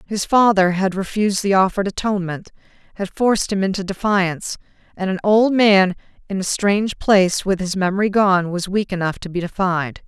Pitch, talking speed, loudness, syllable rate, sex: 195 Hz, 175 wpm, -18 LUFS, 5.5 syllables/s, female